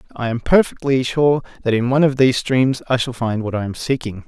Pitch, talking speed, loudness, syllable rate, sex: 125 Hz, 240 wpm, -18 LUFS, 6.0 syllables/s, male